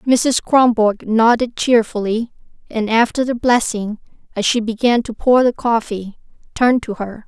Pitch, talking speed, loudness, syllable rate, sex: 230 Hz, 150 wpm, -16 LUFS, 4.5 syllables/s, female